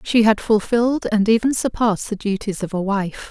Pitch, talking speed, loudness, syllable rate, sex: 215 Hz, 200 wpm, -19 LUFS, 5.3 syllables/s, female